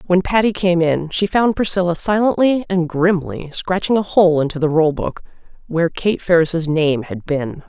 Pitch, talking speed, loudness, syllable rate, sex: 175 Hz, 180 wpm, -17 LUFS, 4.7 syllables/s, female